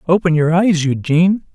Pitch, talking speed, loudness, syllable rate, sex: 170 Hz, 155 wpm, -15 LUFS, 5.3 syllables/s, male